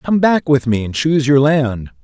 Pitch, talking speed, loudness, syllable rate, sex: 145 Hz, 235 wpm, -15 LUFS, 4.9 syllables/s, male